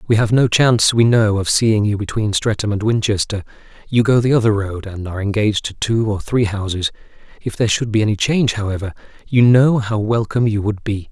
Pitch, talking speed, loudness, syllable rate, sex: 110 Hz, 215 wpm, -17 LUFS, 5.9 syllables/s, male